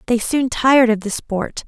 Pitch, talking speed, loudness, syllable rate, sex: 235 Hz, 215 wpm, -17 LUFS, 4.8 syllables/s, female